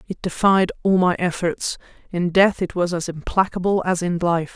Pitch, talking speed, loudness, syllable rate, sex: 180 Hz, 185 wpm, -20 LUFS, 4.8 syllables/s, female